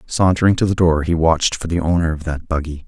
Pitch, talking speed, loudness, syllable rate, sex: 85 Hz, 250 wpm, -17 LUFS, 6.2 syllables/s, male